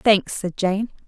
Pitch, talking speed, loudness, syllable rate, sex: 200 Hz, 165 wpm, -22 LUFS, 3.4 syllables/s, female